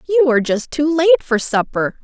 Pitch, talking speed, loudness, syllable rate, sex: 280 Hz, 205 wpm, -16 LUFS, 5.7 syllables/s, female